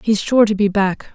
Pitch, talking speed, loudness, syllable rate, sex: 205 Hz, 260 wpm, -16 LUFS, 4.8 syllables/s, female